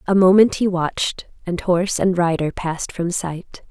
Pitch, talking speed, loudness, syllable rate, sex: 180 Hz, 180 wpm, -19 LUFS, 4.8 syllables/s, female